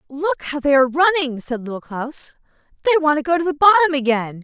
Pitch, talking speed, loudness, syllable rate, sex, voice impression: 295 Hz, 215 wpm, -18 LUFS, 6.3 syllables/s, female, feminine, very adult-like, slightly powerful, slightly muffled, slightly friendly, slightly sharp